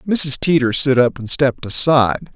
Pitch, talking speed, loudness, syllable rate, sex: 135 Hz, 180 wpm, -16 LUFS, 5.2 syllables/s, male